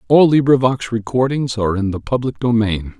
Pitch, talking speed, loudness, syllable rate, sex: 120 Hz, 160 wpm, -17 LUFS, 5.4 syllables/s, male